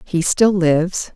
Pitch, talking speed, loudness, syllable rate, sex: 175 Hz, 155 wpm, -16 LUFS, 3.9 syllables/s, female